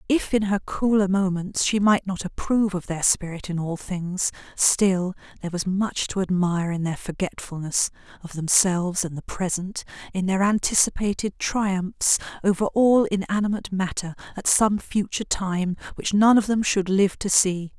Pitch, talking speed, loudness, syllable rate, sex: 190 Hz, 165 wpm, -23 LUFS, 4.8 syllables/s, female